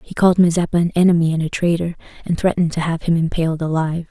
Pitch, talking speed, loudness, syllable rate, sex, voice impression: 165 Hz, 220 wpm, -18 LUFS, 7.2 syllables/s, female, very feminine, very middle-aged, very thin, very relaxed, slightly weak, slightly dark, very soft, very muffled, fluent, raspy, slightly cute, very intellectual, refreshing, slightly sincere, calm, friendly, slightly reassuring, very unique, very elegant, slightly wild, very sweet, lively, very kind, very modest, light